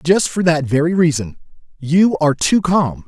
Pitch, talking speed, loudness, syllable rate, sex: 160 Hz, 175 wpm, -16 LUFS, 4.7 syllables/s, male